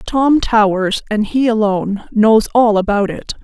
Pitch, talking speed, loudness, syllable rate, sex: 215 Hz, 155 wpm, -14 LUFS, 4.3 syllables/s, female